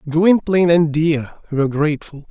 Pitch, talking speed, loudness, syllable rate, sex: 160 Hz, 130 wpm, -17 LUFS, 5.7 syllables/s, male